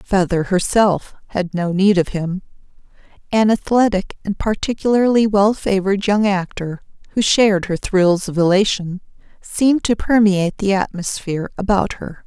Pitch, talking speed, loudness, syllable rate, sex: 195 Hz, 135 wpm, -17 LUFS, 4.8 syllables/s, female